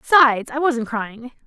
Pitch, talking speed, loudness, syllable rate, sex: 255 Hz, 165 wpm, -19 LUFS, 4.6 syllables/s, female